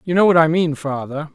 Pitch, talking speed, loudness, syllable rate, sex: 155 Hz, 265 wpm, -17 LUFS, 5.7 syllables/s, male